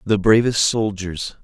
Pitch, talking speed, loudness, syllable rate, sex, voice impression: 105 Hz, 125 wpm, -18 LUFS, 3.9 syllables/s, male, very masculine, slightly middle-aged, thick, relaxed, weak, dark, slightly soft, muffled, slightly fluent, slightly raspy, cool, very intellectual, slightly refreshing, very sincere, very calm, mature, friendly, reassuring, very unique, slightly elegant, wild, slightly sweet, slightly lively, slightly strict, very modest